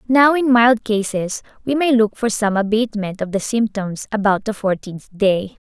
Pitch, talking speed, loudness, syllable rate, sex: 215 Hz, 180 wpm, -18 LUFS, 4.7 syllables/s, female